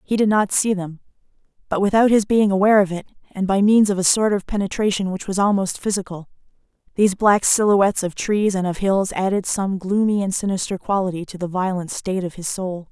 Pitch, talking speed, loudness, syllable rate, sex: 195 Hz, 210 wpm, -19 LUFS, 5.8 syllables/s, female